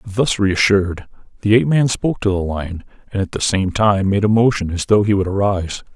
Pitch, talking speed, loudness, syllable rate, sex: 100 Hz, 220 wpm, -17 LUFS, 5.5 syllables/s, male